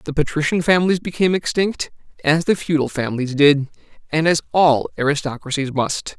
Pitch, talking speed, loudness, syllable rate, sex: 155 Hz, 145 wpm, -19 LUFS, 5.6 syllables/s, male